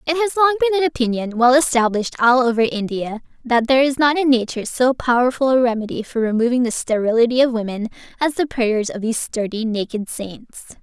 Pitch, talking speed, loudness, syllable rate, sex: 245 Hz, 195 wpm, -18 LUFS, 6.2 syllables/s, female